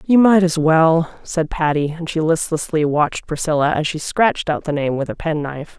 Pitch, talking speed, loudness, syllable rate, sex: 160 Hz, 210 wpm, -18 LUFS, 5.2 syllables/s, female